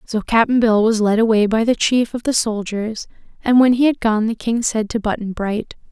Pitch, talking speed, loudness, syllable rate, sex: 225 Hz, 235 wpm, -17 LUFS, 4.9 syllables/s, female